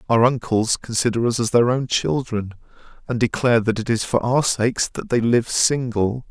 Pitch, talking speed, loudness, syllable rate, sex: 120 Hz, 190 wpm, -20 LUFS, 5.1 syllables/s, male